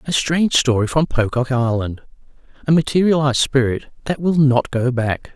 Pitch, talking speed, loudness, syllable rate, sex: 135 Hz, 145 wpm, -18 LUFS, 5.2 syllables/s, male